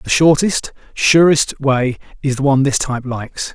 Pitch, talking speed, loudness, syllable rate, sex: 140 Hz, 170 wpm, -15 LUFS, 4.9 syllables/s, male